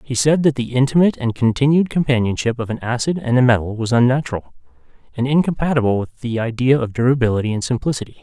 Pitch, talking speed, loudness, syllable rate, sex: 125 Hz, 180 wpm, -18 LUFS, 6.7 syllables/s, male